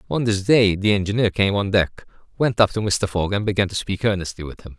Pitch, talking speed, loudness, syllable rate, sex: 100 Hz, 250 wpm, -20 LUFS, 5.9 syllables/s, male